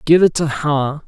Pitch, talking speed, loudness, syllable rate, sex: 150 Hz, 225 wpm, -16 LUFS, 4.2 syllables/s, male